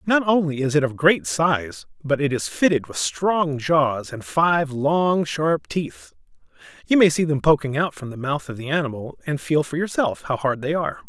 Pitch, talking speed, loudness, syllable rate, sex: 145 Hz, 210 wpm, -21 LUFS, 4.7 syllables/s, male